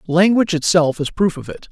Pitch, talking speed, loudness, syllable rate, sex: 170 Hz, 210 wpm, -16 LUFS, 5.8 syllables/s, male